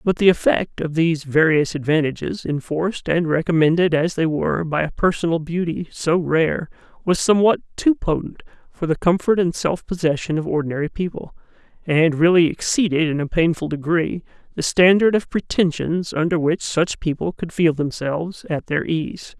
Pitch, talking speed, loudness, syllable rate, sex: 165 Hz, 165 wpm, -20 LUFS, 5.1 syllables/s, male